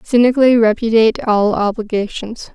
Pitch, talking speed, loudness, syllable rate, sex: 225 Hz, 95 wpm, -14 LUFS, 5.4 syllables/s, female